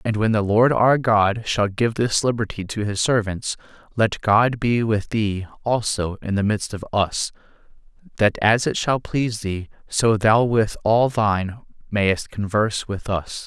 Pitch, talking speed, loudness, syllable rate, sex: 110 Hz, 175 wpm, -21 LUFS, 4.2 syllables/s, male